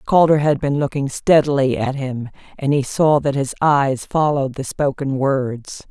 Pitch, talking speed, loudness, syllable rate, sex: 140 Hz, 175 wpm, -18 LUFS, 4.4 syllables/s, female